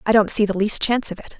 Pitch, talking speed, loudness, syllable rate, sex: 210 Hz, 345 wpm, -18 LUFS, 7.1 syllables/s, female